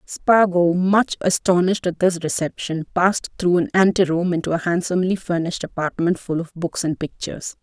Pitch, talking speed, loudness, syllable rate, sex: 175 Hz, 165 wpm, -20 LUFS, 5.4 syllables/s, female